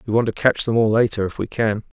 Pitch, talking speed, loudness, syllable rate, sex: 110 Hz, 300 wpm, -20 LUFS, 6.4 syllables/s, male